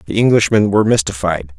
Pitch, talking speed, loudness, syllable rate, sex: 95 Hz, 150 wpm, -14 LUFS, 6.3 syllables/s, male